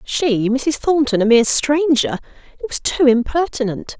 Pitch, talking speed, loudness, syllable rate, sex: 250 Hz, 120 wpm, -16 LUFS, 4.6 syllables/s, female